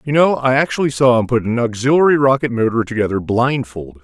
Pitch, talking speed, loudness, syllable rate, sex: 125 Hz, 195 wpm, -16 LUFS, 6.1 syllables/s, male